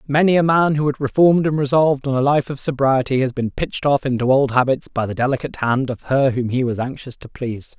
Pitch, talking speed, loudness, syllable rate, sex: 135 Hz, 245 wpm, -18 LUFS, 6.2 syllables/s, male